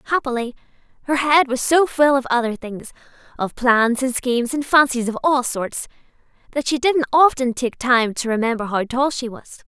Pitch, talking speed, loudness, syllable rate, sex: 255 Hz, 185 wpm, -19 LUFS, 5.0 syllables/s, female